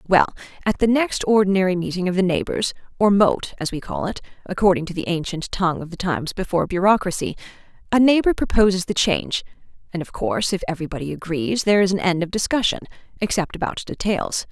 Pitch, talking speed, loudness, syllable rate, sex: 185 Hz, 185 wpm, -21 LUFS, 6.4 syllables/s, female